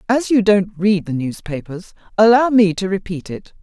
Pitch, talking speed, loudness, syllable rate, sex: 195 Hz, 180 wpm, -17 LUFS, 4.8 syllables/s, female